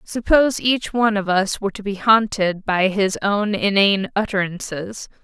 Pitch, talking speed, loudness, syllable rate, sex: 205 Hz, 160 wpm, -19 LUFS, 4.9 syllables/s, female